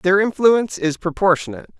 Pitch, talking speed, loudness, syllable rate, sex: 180 Hz, 135 wpm, -18 LUFS, 6.1 syllables/s, male